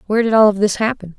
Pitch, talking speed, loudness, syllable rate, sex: 210 Hz, 305 wpm, -15 LUFS, 7.8 syllables/s, female